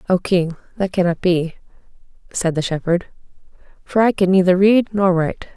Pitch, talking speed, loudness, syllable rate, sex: 180 Hz, 160 wpm, -18 LUFS, 5.2 syllables/s, female